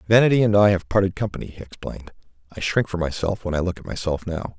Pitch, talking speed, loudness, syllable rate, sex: 95 Hz, 235 wpm, -22 LUFS, 6.7 syllables/s, male